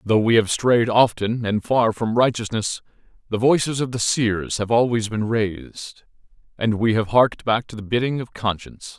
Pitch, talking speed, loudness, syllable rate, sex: 110 Hz, 185 wpm, -20 LUFS, 4.8 syllables/s, male